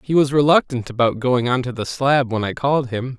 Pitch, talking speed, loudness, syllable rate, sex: 130 Hz, 245 wpm, -19 LUFS, 5.5 syllables/s, male